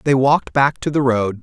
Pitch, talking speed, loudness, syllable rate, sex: 135 Hz, 255 wpm, -17 LUFS, 5.3 syllables/s, male